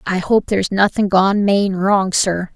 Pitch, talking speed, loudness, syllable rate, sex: 195 Hz, 190 wpm, -16 LUFS, 4.1 syllables/s, female